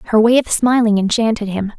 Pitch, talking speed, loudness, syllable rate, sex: 220 Hz, 200 wpm, -15 LUFS, 6.0 syllables/s, female